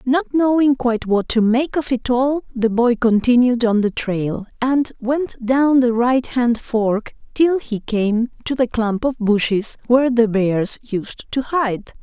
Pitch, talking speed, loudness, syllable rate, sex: 240 Hz, 175 wpm, -18 LUFS, 3.8 syllables/s, female